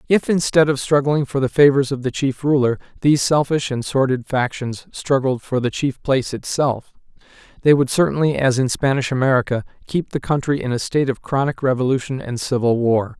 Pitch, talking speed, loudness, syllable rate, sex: 135 Hz, 185 wpm, -19 LUFS, 5.5 syllables/s, male